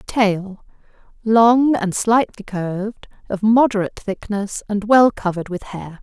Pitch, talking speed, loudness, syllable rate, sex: 210 Hz, 120 wpm, -18 LUFS, 4.1 syllables/s, female